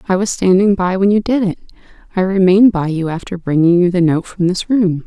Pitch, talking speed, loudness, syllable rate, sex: 185 Hz, 235 wpm, -14 LUFS, 5.8 syllables/s, female